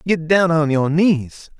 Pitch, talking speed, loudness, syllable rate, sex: 160 Hz, 190 wpm, -16 LUFS, 3.7 syllables/s, male